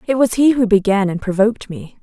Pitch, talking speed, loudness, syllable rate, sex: 215 Hz, 235 wpm, -15 LUFS, 6.0 syllables/s, female